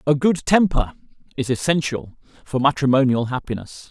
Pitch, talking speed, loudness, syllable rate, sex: 140 Hz, 125 wpm, -20 LUFS, 5.2 syllables/s, male